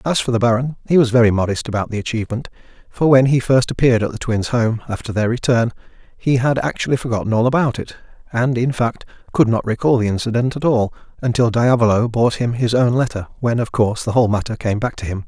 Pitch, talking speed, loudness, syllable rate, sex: 120 Hz, 225 wpm, -18 LUFS, 6.3 syllables/s, male